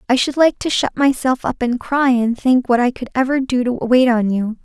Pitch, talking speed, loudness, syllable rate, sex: 250 Hz, 260 wpm, -17 LUFS, 5.1 syllables/s, female